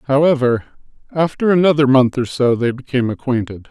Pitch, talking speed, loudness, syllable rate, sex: 135 Hz, 145 wpm, -16 LUFS, 5.9 syllables/s, male